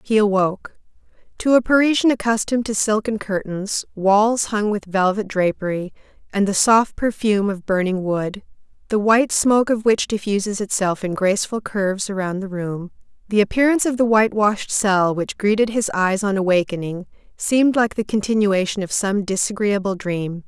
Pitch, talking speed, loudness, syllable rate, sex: 205 Hz, 160 wpm, -19 LUFS, 5.2 syllables/s, female